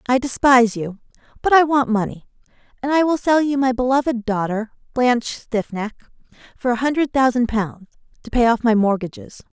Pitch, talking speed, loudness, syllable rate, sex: 245 Hz, 170 wpm, -19 LUFS, 5.6 syllables/s, female